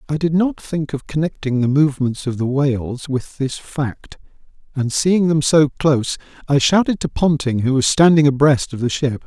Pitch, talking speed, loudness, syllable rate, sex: 140 Hz, 195 wpm, -18 LUFS, 4.9 syllables/s, male